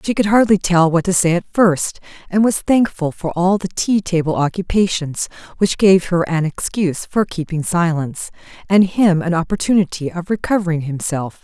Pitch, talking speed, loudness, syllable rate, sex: 180 Hz, 175 wpm, -17 LUFS, 5.1 syllables/s, female